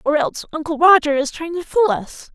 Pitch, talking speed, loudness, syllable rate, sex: 310 Hz, 230 wpm, -18 LUFS, 5.6 syllables/s, female